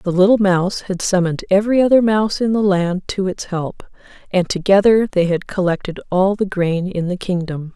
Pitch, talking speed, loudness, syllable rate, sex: 190 Hz, 195 wpm, -17 LUFS, 5.3 syllables/s, female